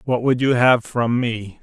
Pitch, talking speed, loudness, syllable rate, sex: 120 Hz, 220 wpm, -18 LUFS, 4.0 syllables/s, male